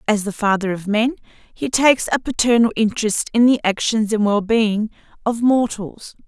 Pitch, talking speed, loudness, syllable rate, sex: 220 Hz, 165 wpm, -18 LUFS, 5.0 syllables/s, female